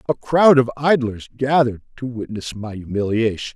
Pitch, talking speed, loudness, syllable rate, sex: 120 Hz, 150 wpm, -19 LUFS, 5.1 syllables/s, male